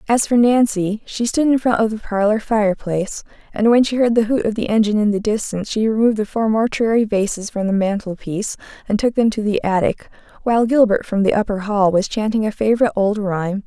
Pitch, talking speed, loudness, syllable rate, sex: 215 Hz, 220 wpm, -18 LUFS, 6.1 syllables/s, female